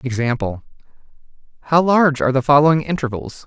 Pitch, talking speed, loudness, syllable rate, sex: 135 Hz, 120 wpm, -17 LUFS, 6.5 syllables/s, male